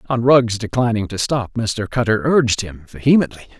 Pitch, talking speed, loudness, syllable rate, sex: 115 Hz, 165 wpm, -18 LUFS, 5.3 syllables/s, male